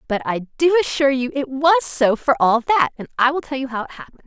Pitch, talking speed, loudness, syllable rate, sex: 265 Hz, 265 wpm, -19 LUFS, 6.0 syllables/s, female